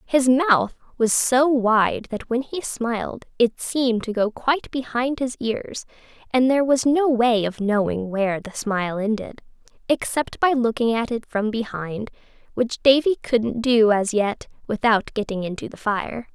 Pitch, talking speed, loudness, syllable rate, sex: 235 Hz, 170 wpm, -21 LUFS, 4.4 syllables/s, female